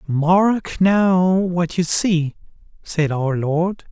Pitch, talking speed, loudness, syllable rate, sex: 170 Hz, 125 wpm, -18 LUFS, 2.4 syllables/s, male